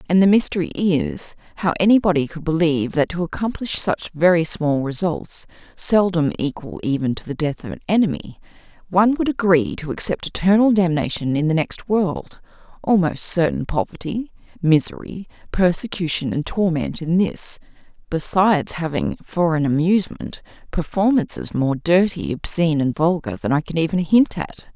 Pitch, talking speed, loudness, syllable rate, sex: 170 Hz, 150 wpm, -20 LUFS, 5.1 syllables/s, female